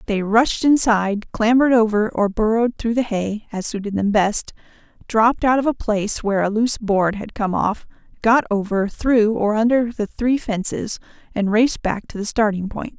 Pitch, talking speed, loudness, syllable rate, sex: 220 Hz, 190 wpm, -19 LUFS, 5.0 syllables/s, female